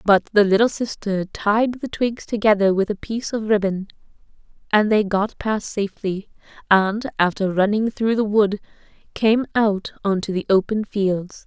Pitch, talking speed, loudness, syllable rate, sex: 205 Hz, 160 wpm, -20 LUFS, 4.5 syllables/s, female